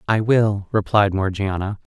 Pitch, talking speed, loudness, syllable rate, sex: 100 Hz, 125 wpm, -20 LUFS, 4.3 syllables/s, male